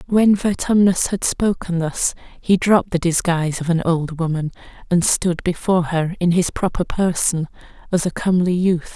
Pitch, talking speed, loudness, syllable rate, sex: 175 Hz, 165 wpm, -19 LUFS, 4.9 syllables/s, female